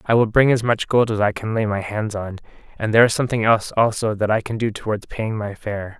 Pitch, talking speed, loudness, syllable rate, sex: 110 Hz, 270 wpm, -20 LUFS, 6.1 syllables/s, male